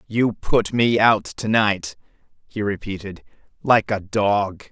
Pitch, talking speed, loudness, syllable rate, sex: 105 Hz, 140 wpm, -20 LUFS, 3.5 syllables/s, male